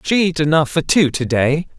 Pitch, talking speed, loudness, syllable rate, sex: 155 Hz, 235 wpm, -16 LUFS, 5.0 syllables/s, male